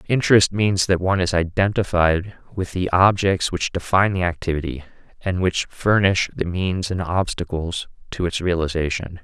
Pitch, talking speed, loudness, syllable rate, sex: 90 Hz, 150 wpm, -20 LUFS, 4.9 syllables/s, male